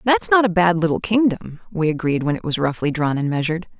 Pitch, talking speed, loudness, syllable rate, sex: 175 Hz, 235 wpm, -19 LUFS, 6.1 syllables/s, female